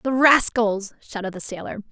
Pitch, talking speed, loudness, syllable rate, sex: 220 Hz, 155 wpm, -21 LUFS, 4.8 syllables/s, female